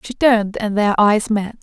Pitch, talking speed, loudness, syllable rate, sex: 215 Hz, 220 wpm, -16 LUFS, 4.8 syllables/s, female